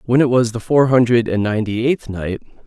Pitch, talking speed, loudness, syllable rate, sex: 120 Hz, 225 wpm, -17 LUFS, 5.2 syllables/s, male